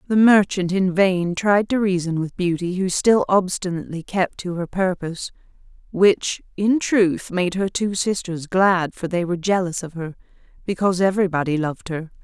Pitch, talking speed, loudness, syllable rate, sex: 185 Hz, 165 wpm, -20 LUFS, 4.9 syllables/s, female